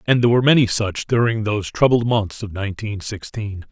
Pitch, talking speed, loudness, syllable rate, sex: 110 Hz, 195 wpm, -19 LUFS, 5.9 syllables/s, male